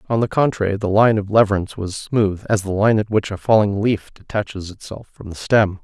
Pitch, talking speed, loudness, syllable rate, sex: 105 Hz, 225 wpm, -18 LUFS, 5.6 syllables/s, male